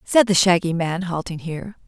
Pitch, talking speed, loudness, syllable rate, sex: 180 Hz, 190 wpm, -20 LUFS, 5.3 syllables/s, female